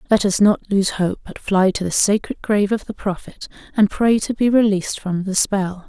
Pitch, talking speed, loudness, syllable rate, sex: 200 Hz, 225 wpm, -18 LUFS, 5.2 syllables/s, female